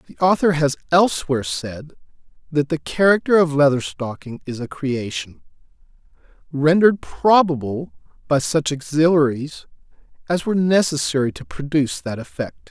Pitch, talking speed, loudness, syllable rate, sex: 145 Hz, 125 wpm, -19 LUFS, 5.1 syllables/s, male